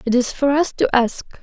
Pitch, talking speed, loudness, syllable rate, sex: 260 Hz, 250 wpm, -18 LUFS, 5.3 syllables/s, female